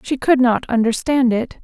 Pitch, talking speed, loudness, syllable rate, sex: 250 Hz, 185 wpm, -17 LUFS, 4.6 syllables/s, female